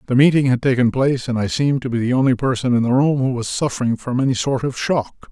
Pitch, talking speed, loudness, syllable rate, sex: 130 Hz, 270 wpm, -18 LUFS, 6.5 syllables/s, male